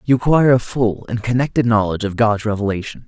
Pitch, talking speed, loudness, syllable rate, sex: 115 Hz, 195 wpm, -17 LUFS, 6.5 syllables/s, male